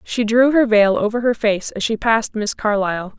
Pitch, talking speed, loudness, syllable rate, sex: 220 Hz, 225 wpm, -17 LUFS, 5.3 syllables/s, female